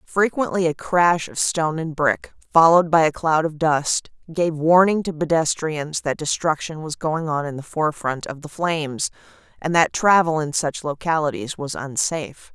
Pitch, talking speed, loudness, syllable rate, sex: 160 Hz, 170 wpm, -20 LUFS, 4.8 syllables/s, female